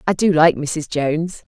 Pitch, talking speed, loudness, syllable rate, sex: 160 Hz, 195 wpm, -18 LUFS, 4.6 syllables/s, female